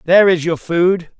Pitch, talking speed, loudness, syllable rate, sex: 175 Hz, 200 wpm, -15 LUFS, 5.0 syllables/s, male